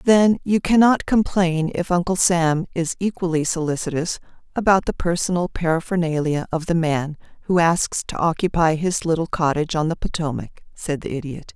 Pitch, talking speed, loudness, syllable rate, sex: 170 Hz, 155 wpm, -21 LUFS, 5.2 syllables/s, female